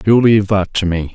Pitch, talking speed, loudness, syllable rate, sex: 100 Hz, 265 wpm, -14 LUFS, 5.8 syllables/s, male